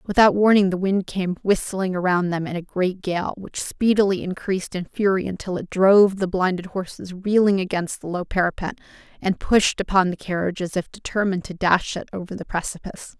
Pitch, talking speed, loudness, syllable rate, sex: 185 Hz, 190 wpm, -22 LUFS, 5.6 syllables/s, female